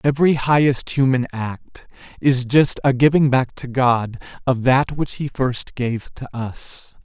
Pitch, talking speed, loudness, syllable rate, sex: 130 Hz, 160 wpm, -19 LUFS, 3.9 syllables/s, male